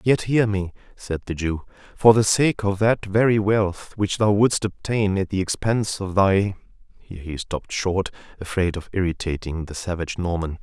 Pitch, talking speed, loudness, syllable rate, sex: 95 Hz, 175 wpm, -22 LUFS, 4.8 syllables/s, male